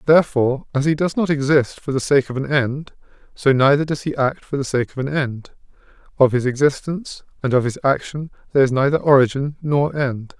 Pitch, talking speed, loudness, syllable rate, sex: 140 Hz, 210 wpm, -19 LUFS, 5.6 syllables/s, male